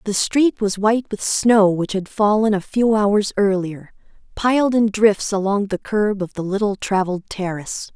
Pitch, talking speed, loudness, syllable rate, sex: 205 Hz, 180 wpm, -19 LUFS, 4.6 syllables/s, female